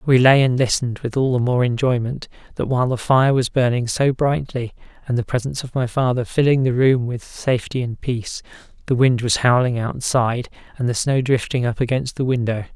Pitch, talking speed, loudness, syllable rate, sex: 125 Hz, 200 wpm, -19 LUFS, 5.6 syllables/s, male